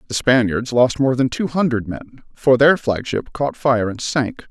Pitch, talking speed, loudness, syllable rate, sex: 130 Hz, 215 wpm, -18 LUFS, 4.6 syllables/s, male